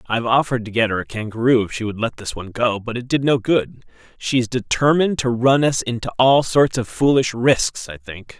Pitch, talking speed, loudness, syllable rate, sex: 120 Hz, 235 wpm, -19 LUFS, 5.6 syllables/s, male